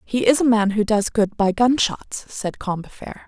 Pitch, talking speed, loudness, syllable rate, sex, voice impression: 220 Hz, 220 wpm, -20 LUFS, 4.8 syllables/s, female, feminine, adult-like, tensed, powerful, slightly hard, slightly muffled, raspy, intellectual, calm, elegant, slightly lively, slightly sharp